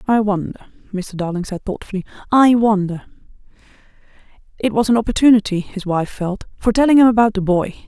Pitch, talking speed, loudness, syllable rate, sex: 210 Hz, 160 wpm, -17 LUFS, 5.9 syllables/s, female